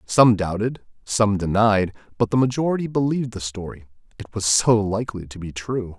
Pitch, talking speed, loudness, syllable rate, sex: 105 Hz, 160 wpm, -21 LUFS, 5.4 syllables/s, male